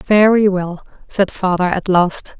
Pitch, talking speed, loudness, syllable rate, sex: 190 Hz, 150 wpm, -15 LUFS, 3.8 syllables/s, female